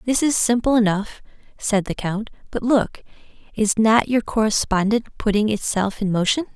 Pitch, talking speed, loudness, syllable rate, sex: 220 Hz, 155 wpm, -20 LUFS, 4.9 syllables/s, female